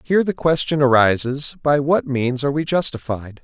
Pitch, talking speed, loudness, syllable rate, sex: 140 Hz, 175 wpm, -19 LUFS, 5.2 syllables/s, male